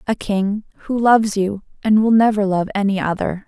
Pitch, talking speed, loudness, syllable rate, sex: 205 Hz, 190 wpm, -18 LUFS, 5.3 syllables/s, female